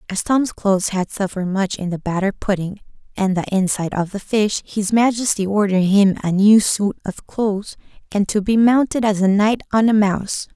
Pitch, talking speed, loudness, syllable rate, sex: 200 Hz, 200 wpm, -18 LUFS, 5.3 syllables/s, female